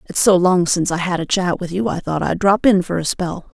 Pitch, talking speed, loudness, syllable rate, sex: 180 Hz, 300 wpm, -17 LUFS, 5.7 syllables/s, female